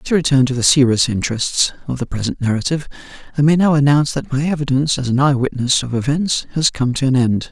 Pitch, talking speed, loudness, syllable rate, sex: 135 Hz, 225 wpm, -16 LUFS, 6.4 syllables/s, male